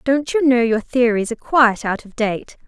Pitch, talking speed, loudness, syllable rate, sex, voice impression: 240 Hz, 225 wpm, -18 LUFS, 5.2 syllables/s, female, very feminine, young, thin, very tensed, slightly powerful, very bright, slightly hard, very clear, fluent, very cute, intellectual, refreshing, slightly sincere, calm, very friendly, very reassuring, slightly unique, elegant, slightly wild, sweet, lively, kind, slightly sharp, modest, light